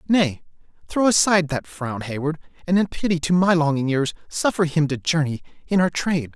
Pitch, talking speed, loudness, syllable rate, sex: 165 Hz, 190 wpm, -21 LUFS, 5.4 syllables/s, male